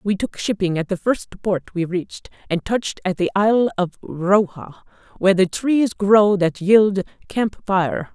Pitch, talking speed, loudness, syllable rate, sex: 195 Hz, 170 wpm, -19 LUFS, 4.5 syllables/s, female